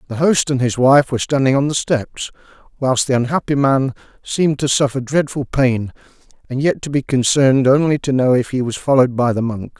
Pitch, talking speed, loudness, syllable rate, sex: 135 Hz, 210 wpm, -16 LUFS, 5.6 syllables/s, male